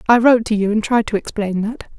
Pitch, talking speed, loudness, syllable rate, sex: 220 Hz, 270 wpm, -17 LUFS, 6.6 syllables/s, female